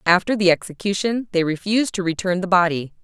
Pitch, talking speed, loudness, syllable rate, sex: 185 Hz, 180 wpm, -20 LUFS, 6.1 syllables/s, female